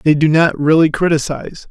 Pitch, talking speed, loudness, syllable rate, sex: 155 Hz, 175 wpm, -14 LUFS, 5.6 syllables/s, male